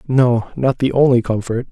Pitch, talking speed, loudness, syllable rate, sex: 125 Hz, 175 wpm, -16 LUFS, 4.8 syllables/s, male